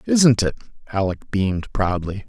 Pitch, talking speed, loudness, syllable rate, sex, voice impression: 105 Hz, 130 wpm, -21 LUFS, 4.4 syllables/s, male, very masculine, very adult-like, middle-aged, very thick, very tensed, powerful, bright, soft, very clear, fluent, slightly raspy, very cool, very intellectual, very calm, mature, friendly, reassuring, very elegant, sweet, very kind